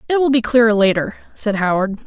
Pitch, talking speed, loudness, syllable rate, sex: 225 Hz, 205 wpm, -16 LUFS, 6.0 syllables/s, female